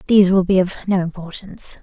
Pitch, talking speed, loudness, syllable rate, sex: 185 Hz, 195 wpm, -17 LUFS, 6.6 syllables/s, female